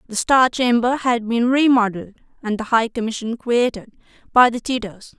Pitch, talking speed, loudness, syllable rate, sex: 235 Hz, 160 wpm, -18 LUFS, 5.1 syllables/s, female